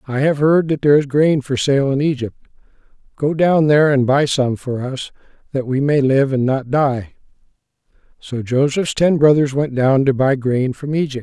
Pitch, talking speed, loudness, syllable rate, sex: 140 Hz, 200 wpm, -16 LUFS, 4.8 syllables/s, male